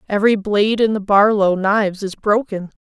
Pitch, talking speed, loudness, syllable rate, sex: 205 Hz, 170 wpm, -16 LUFS, 5.5 syllables/s, female